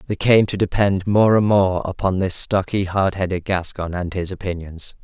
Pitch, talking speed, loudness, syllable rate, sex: 95 Hz, 190 wpm, -19 LUFS, 4.8 syllables/s, male